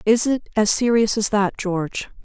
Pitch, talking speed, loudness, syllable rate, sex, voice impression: 215 Hz, 190 wpm, -20 LUFS, 4.6 syllables/s, female, feminine, adult-like, relaxed, slightly dark, soft, slightly raspy, intellectual, calm, reassuring, elegant, kind, modest